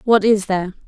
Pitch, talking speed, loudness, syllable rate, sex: 205 Hz, 205 wpm, -17 LUFS, 6.0 syllables/s, female